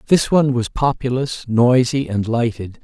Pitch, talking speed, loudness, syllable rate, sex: 125 Hz, 150 wpm, -18 LUFS, 4.6 syllables/s, male